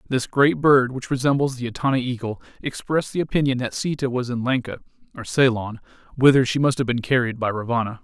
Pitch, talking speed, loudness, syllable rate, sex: 125 Hz, 185 wpm, -21 LUFS, 6.1 syllables/s, male